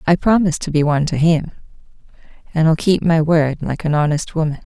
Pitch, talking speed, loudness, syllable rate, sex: 160 Hz, 205 wpm, -17 LUFS, 6.1 syllables/s, female